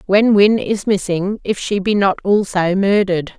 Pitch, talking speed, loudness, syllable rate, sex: 195 Hz, 175 wpm, -16 LUFS, 4.4 syllables/s, female